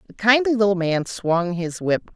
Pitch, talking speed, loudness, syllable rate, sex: 195 Hz, 195 wpm, -20 LUFS, 4.6 syllables/s, female